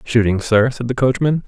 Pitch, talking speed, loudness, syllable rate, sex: 120 Hz, 205 wpm, -17 LUFS, 5.1 syllables/s, male